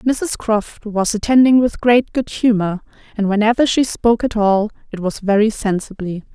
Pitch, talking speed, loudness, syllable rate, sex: 220 Hz, 170 wpm, -17 LUFS, 4.8 syllables/s, female